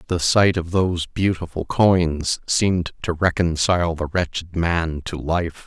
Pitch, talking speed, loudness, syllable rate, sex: 85 Hz, 150 wpm, -21 LUFS, 4.1 syllables/s, male